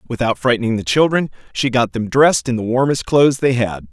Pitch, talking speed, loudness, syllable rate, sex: 125 Hz, 215 wpm, -16 LUFS, 6.0 syllables/s, male